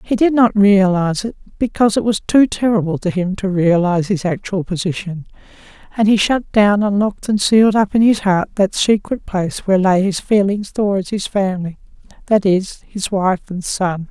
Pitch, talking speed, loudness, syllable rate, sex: 195 Hz, 195 wpm, -16 LUFS, 5.3 syllables/s, female